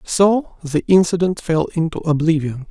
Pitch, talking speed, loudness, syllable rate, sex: 165 Hz, 135 wpm, -18 LUFS, 4.4 syllables/s, male